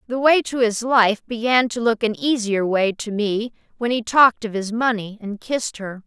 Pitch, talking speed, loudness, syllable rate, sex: 225 Hz, 220 wpm, -20 LUFS, 4.9 syllables/s, female